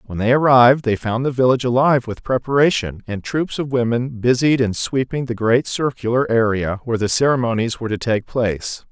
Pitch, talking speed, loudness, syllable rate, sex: 120 Hz, 190 wpm, -18 LUFS, 5.7 syllables/s, male